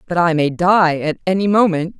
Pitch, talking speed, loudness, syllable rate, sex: 175 Hz, 210 wpm, -16 LUFS, 5.1 syllables/s, female